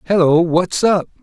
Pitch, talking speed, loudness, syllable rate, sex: 175 Hz, 145 wpm, -15 LUFS, 4.5 syllables/s, male